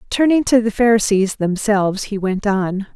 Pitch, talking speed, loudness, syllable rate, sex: 210 Hz, 165 wpm, -17 LUFS, 4.8 syllables/s, female